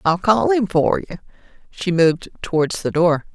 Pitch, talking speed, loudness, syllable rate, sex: 180 Hz, 180 wpm, -18 LUFS, 4.9 syllables/s, female